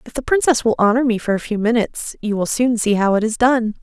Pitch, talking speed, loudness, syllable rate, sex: 230 Hz, 285 wpm, -17 LUFS, 6.1 syllables/s, female